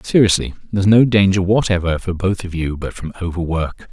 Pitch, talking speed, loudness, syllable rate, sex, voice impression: 95 Hz, 185 wpm, -17 LUFS, 5.5 syllables/s, male, masculine, adult-like, slightly thick, tensed, slightly dark, soft, fluent, cool, calm, slightly mature, friendly, reassuring, wild, kind, modest